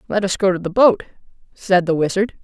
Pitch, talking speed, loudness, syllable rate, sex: 195 Hz, 220 wpm, -17 LUFS, 5.8 syllables/s, female